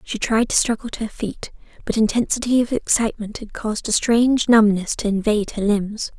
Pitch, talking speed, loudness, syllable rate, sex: 220 Hz, 195 wpm, -20 LUFS, 5.6 syllables/s, female